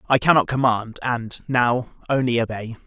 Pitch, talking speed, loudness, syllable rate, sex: 120 Hz, 145 wpm, -21 LUFS, 4.7 syllables/s, male